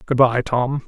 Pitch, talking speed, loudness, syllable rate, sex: 125 Hz, 205 wpm, -18 LUFS, 4.1 syllables/s, male